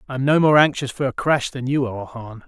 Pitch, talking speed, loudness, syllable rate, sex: 130 Hz, 290 wpm, -19 LUFS, 6.1 syllables/s, male